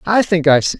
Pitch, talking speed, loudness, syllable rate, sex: 170 Hz, 305 wpm, -14 LUFS, 6.0 syllables/s, male